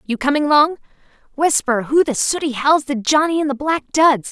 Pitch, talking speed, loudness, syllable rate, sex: 285 Hz, 195 wpm, -17 LUFS, 4.9 syllables/s, female